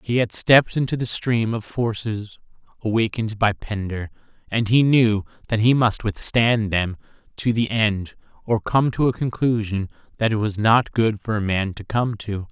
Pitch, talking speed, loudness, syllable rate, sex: 110 Hz, 180 wpm, -21 LUFS, 4.6 syllables/s, male